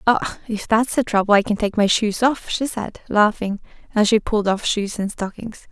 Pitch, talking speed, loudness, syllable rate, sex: 215 Hz, 220 wpm, -20 LUFS, 5.1 syllables/s, female